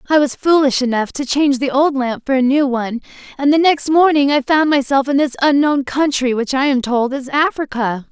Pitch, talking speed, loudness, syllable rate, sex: 275 Hz, 220 wpm, -15 LUFS, 5.4 syllables/s, female